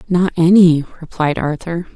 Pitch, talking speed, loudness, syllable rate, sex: 170 Hz, 125 wpm, -15 LUFS, 4.6 syllables/s, female